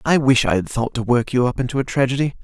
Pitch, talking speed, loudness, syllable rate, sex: 125 Hz, 295 wpm, -19 LUFS, 6.6 syllables/s, male